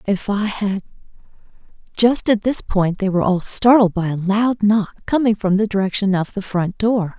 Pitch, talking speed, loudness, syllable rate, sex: 200 Hz, 190 wpm, -18 LUFS, 4.7 syllables/s, female